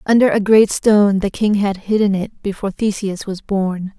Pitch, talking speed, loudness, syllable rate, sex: 200 Hz, 195 wpm, -16 LUFS, 5.0 syllables/s, female